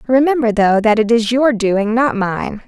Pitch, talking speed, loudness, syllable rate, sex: 230 Hz, 200 wpm, -14 LUFS, 4.5 syllables/s, female